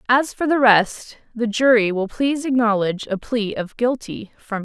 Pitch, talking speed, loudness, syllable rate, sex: 230 Hz, 180 wpm, -19 LUFS, 4.7 syllables/s, female